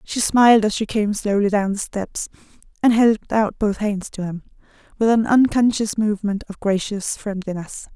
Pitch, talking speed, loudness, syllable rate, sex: 210 Hz, 175 wpm, -20 LUFS, 4.9 syllables/s, female